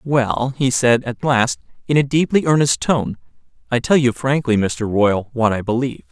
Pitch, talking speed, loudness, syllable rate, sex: 125 Hz, 185 wpm, -18 LUFS, 4.9 syllables/s, male